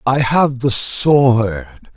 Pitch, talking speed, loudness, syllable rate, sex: 125 Hz, 120 wpm, -14 LUFS, 2.2 syllables/s, male